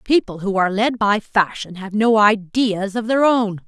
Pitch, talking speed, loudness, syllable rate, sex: 210 Hz, 195 wpm, -18 LUFS, 4.5 syllables/s, female